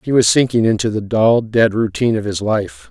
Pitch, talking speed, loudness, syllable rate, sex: 110 Hz, 225 wpm, -16 LUFS, 5.3 syllables/s, male